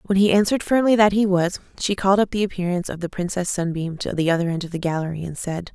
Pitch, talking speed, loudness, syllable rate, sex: 185 Hz, 260 wpm, -21 LUFS, 6.8 syllables/s, female